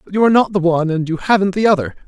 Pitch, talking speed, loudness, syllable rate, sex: 185 Hz, 320 wpm, -15 LUFS, 7.9 syllables/s, male